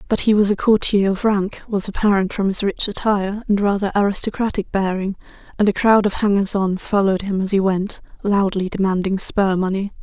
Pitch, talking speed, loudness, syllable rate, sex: 200 Hz, 190 wpm, -19 LUFS, 5.6 syllables/s, female